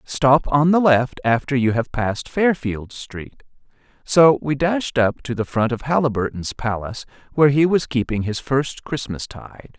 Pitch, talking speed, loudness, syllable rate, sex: 130 Hz, 170 wpm, -19 LUFS, 4.5 syllables/s, male